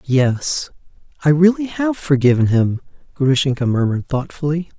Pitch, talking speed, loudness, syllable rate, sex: 145 Hz, 115 wpm, -17 LUFS, 4.8 syllables/s, male